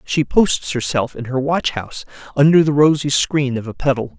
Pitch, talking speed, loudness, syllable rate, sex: 140 Hz, 200 wpm, -17 LUFS, 5.1 syllables/s, male